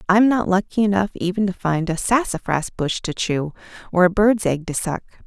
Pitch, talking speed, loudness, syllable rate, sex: 190 Hz, 205 wpm, -20 LUFS, 5.2 syllables/s, female